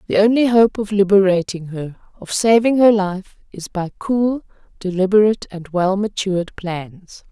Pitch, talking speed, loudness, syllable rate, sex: 200 Hz, 150 wpm, -17 LUFS, 4.6 syllables/s, female